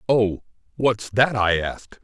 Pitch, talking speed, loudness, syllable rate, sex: 110 Hz, 145 wpm, -21 LUFS, 3.9 syllables/s, male